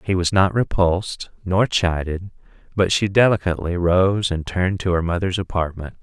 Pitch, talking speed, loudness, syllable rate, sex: 90 Hz, 160 wpm, -20 LUFS, 5.1 syllables/s, male